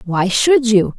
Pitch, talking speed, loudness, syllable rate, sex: 220 Hz, 185 wpm, -14 LUFS, 3.5 syllables/s, female